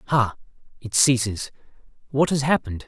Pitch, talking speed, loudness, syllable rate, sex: 125 Hz, 105 wpm, -22 LUFS, 5.7 syllables/s, male